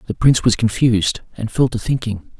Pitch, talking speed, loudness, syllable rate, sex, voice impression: 115 Hz, 200 wpm, -18 LUFS, 5.8 syllables/s, male, very masculine, slightly young, slightly thick, slightly relaxed, weak, dark, slightly soft, muffled, halting, slightly cool, very intellectual, refreshing, sincere, very calm, slightly mature, slightly friendly, slightly reassuring, very unique, slightly elegant, slightly wild, slightly sweet, slightly lively, kind, very modest